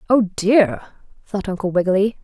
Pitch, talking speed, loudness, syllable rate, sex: 200 Hz, 135 wpm, -18 LUFS, 4.6 syllables/s, female